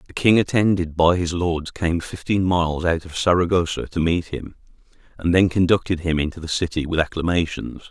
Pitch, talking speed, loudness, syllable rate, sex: 85 Hz, 180 wpm, -21 LUFS, 5.4 syllables/s, male